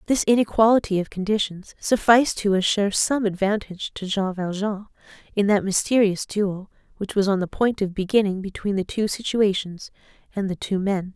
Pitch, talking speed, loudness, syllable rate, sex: 200 Hz, 165 wpm, -22 LUFS, 5.4 syllables/s, female